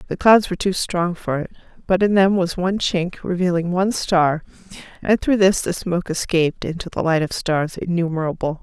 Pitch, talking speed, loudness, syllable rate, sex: 175 Hz, 195 wpm, -19 LUFS, 5.5 syllables/s, female